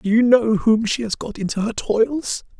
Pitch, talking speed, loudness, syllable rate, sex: 225 Hz, 230 wpm, -19 LUFS, 4.5 syllables/s, male